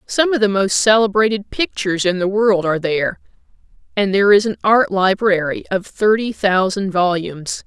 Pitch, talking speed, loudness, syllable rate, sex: 200 Hz, 165 wpm, -16 LUFS, 5.2 syllables/s, female